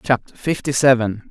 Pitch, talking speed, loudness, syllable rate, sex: 125 Hz, 140 wpm, -18 LUFS, 5.0 syllables/s, male